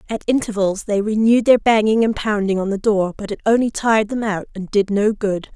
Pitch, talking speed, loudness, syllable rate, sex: 210 Hz, 225 wpm, -18 LUFS, 5.7 syllables/s, female